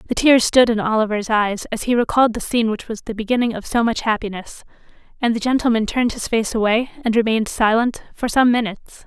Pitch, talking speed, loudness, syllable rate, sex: 225 Hz, 210 wpm, -18 LUFS, 6.2 syllables/s, female